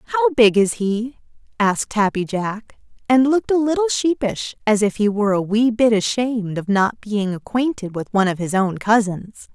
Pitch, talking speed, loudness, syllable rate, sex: 215 Hz, 190 wpm, -19 LUFS, 5.0 syllables/s, female